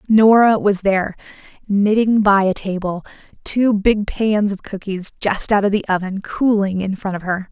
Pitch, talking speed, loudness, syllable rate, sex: 200 Hz, 175 wpm, -17 LUFS, 4.6 syllables/s, female